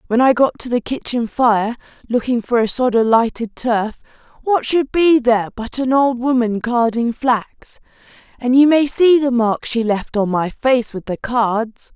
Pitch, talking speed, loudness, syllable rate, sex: 240 Hz, 190 wpm, -17 LUFS, 4.2 syllables/s, female